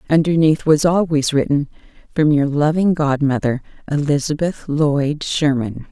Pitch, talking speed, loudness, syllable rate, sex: 150 Hz, 110 wpm, -17 LUFS, 4.6 syllables/s, female